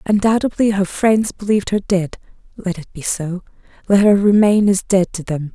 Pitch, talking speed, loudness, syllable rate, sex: 195 Hz, 160 wpm, -17 LUFS, 5.0 syllables/s, female